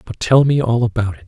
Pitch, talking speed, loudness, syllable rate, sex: 120 Hz, 285 wpm, -16 LUFS, 6.0 syllables/s, male